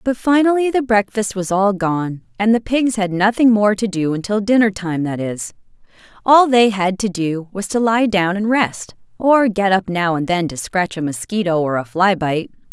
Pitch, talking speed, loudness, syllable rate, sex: 200 Hz, 210 wpm, -17 LUFS, 4.7 syllables/s, female